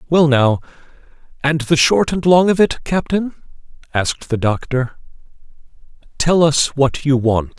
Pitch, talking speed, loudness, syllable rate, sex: 145 Hz, 140 wpm, -16 LUFS, 4.4 syllables/s, male